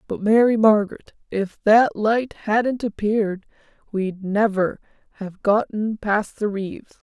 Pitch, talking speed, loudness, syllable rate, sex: 210 Hz, 135 wpm, -21 LUFS, 3.9 syllables/s, female